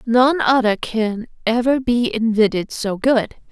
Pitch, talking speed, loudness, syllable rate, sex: 230 Hz, 135 wpm, -18 LUFS, 3.8 syllables/s, female